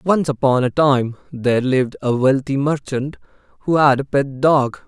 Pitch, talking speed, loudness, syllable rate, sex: 135 Hz, 170 wpm, -18 LUFS, 4.7 syllables/s, male